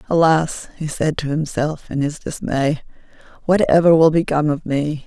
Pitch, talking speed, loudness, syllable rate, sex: 155 Hz, 165 wpm, -18 LUFS, 4.9 syllables/s, female